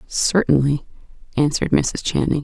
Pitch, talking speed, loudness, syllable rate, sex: 145 Hz, 100 wpm, -19 LUFS, 5.1 syllables/s, female